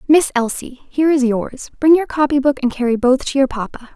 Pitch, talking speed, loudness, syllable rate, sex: 265 Hz, 230 wpm, -16 LUFS, 5.6 syllables/s, female